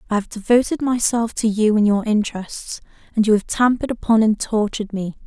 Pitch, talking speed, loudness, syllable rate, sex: 220 Hz, 195 wpm, -19 LUFS, 5.6 syllables/s, female